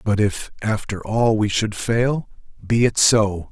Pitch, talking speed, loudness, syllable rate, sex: 110 Hz, 170 wpm, -20 LUFS, 3.7 syllables/s, male